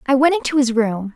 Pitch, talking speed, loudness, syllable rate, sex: 260 Hz, 260 wpm, -17 LUFS, 6.1 syllables/s, female